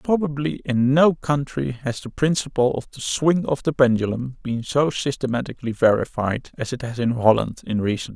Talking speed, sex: 185 wpm, male